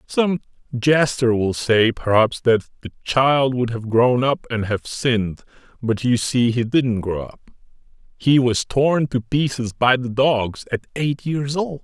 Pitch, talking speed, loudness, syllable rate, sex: 125 Hz, 170 wpm, -19 LUFS, 3.9 syllables/s, male